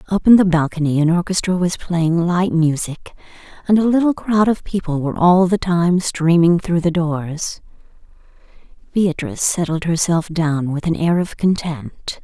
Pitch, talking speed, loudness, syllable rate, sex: 170 Hz, 160 wpm, -17 LUFS, 4.6 syllables/s, female